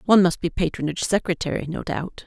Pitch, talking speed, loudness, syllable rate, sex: 175 Hz, 185 wpm, -23 LUFS, 6.7 syllables/s, female